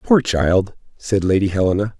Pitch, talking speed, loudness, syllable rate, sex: 100 Hz, 150 wpm, -18 LUFS, 4.9 syllables/s, male